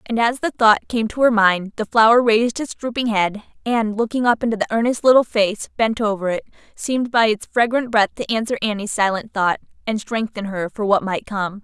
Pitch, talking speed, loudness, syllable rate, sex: 220 Hz, 215 wpm, -19 LUFS, 5.4 syllables/s, female